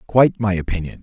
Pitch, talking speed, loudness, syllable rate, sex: 100 Hz, 175 wpm, -19 LUFS, 6.7 syllables/s, male